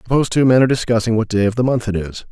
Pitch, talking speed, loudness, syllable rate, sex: 115 Hz, 310 wpm, -16 LUFS, 8.0 syllables/s, male